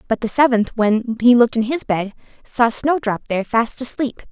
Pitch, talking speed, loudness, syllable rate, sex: 235 Hz, 195 wpm, -18 LUFS, 5.0 syllables/s, female